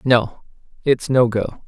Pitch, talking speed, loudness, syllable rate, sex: 120 Hz, 145 wpm, -19 LUFS, 3.4 syllables/s, male